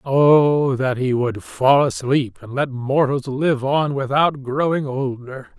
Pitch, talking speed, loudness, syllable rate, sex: 135 Hz, 150 wpm, -19 LUFS, 3.5 syllables/s, male